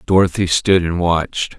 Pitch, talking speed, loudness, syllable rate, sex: 85 Hz, 150 wpm, -16 LUFS, 4.8 syllables/s, male